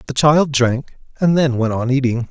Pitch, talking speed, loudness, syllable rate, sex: 135 Hz, 210 wpm, -16 LUFS, 4.7 syllables/s, male